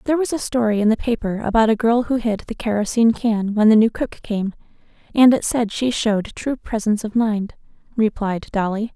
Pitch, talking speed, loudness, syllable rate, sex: 225 Hz, 210 wpm, -19 LUFS, 5.6 syllables/s, female